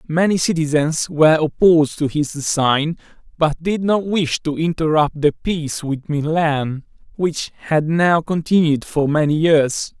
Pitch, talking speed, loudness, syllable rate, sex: 160 Hz, 145 wpm, -18 LUFS, 4.2 syllables/s, male